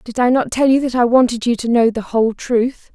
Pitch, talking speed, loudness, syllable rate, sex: 240 Hz, 285 wpm, -16 LUFS, 5.6 syllables/s, female